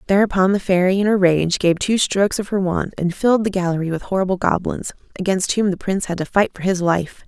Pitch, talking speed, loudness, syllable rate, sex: 190 Hz, 240 wpm, -19 LUFS, 6.1 syllables/s, female